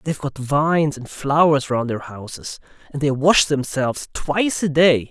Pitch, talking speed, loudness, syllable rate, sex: 145 Hz, 175 wpm, -19 LUFS, 4.8 syllables/s, male